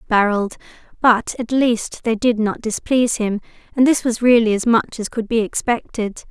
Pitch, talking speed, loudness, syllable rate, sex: 230 Hz, 180 wpm, -18 LUFS, 4.8 syllables/s, female